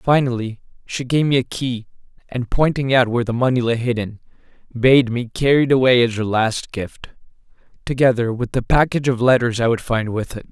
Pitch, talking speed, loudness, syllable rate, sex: 125 Hz, 195 wpm, -18 LUFS, 5.5 syllables/s, male